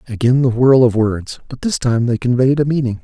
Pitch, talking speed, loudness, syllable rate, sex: 125 Hz, 235 wpm, -15 LUFS, 5.4 syllables/s, male